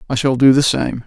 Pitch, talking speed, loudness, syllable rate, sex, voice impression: 130 Hz, 280 wpm, -14 LUFS, 5.6 syllables/s, male, masculine, middle-aged, relaxed, weak, dark, muffled, halting, raspy, calm, slightly friendly, slightly wild, kind, modest